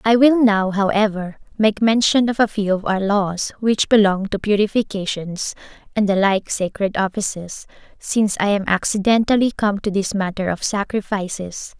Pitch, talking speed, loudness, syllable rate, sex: 205 Hz, 160 wpm, -19 LUFS, 4.8 syllables/s, female